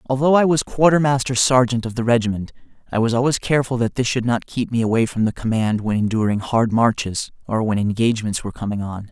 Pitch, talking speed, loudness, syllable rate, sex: 115 Hz, 210 wpm, -19 LUFS, 6.1 syllables/s, male